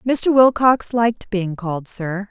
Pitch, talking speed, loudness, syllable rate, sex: 215 Hz, 155 wpm, -18 LUFS, 4.2 syllables/s, female